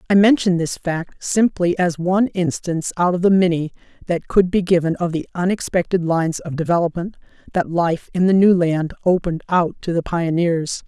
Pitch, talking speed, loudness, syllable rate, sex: 175 Hz, 180 wpm, -19 LUFS, 5.2 syllables/s, female